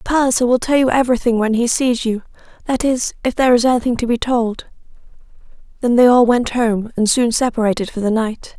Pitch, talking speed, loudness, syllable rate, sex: 240 Hz, 195 wpm, -16 LUFS, 5.8 syllables/s, female